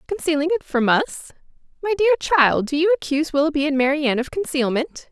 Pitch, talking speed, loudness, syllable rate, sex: 305 Hz, 175 wpm, -20 LUFS, 5.9 syllables/s, female